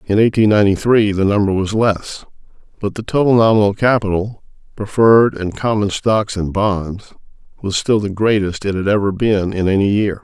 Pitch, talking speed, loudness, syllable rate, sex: 105 Hz, 175 wpm, -15 LUFS, 4.4 syllables/s, male